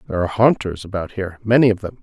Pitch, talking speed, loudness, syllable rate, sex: 100 Hz, 210 wpm, -19 LUFS, 8.0 syllables/s, male